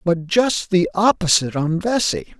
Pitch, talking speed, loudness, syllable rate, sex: 190 Hz, 150 wpm, -18 LUFS, 4.5 syllables/s, male